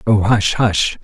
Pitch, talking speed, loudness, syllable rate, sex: 105 Hz, 175 wpm, -15 LUFS, 3.4 syllables/s, male